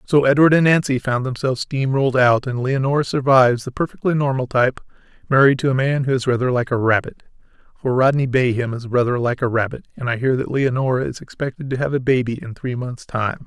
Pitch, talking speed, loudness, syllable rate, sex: 130 Hz, 215 wpm, -19 LUFS, 6.1 syllables/s, male